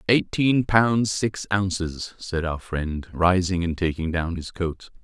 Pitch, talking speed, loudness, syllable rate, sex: 90 Hz, 155 wpm, -24 LUFS, 3.7 syllables/s, male